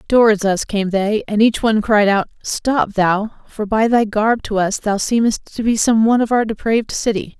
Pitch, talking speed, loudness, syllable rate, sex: 215 Hz, 220 wpm, -16 LUFS, 4.9 syllables/s, female